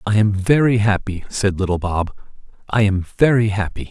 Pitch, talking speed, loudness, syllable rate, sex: 105 Hz, 170 wpm, -18 LUFS, 5.2 syllables/s, male